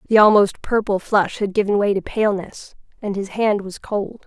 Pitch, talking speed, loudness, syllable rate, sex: 205 Hz, 195 wpm, -19 LUFS, 5.0 syllables/s, female